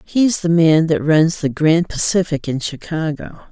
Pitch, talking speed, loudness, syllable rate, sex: 160 Hz, 170 wpm, -16 LUFS, 4.2 syllables/s, female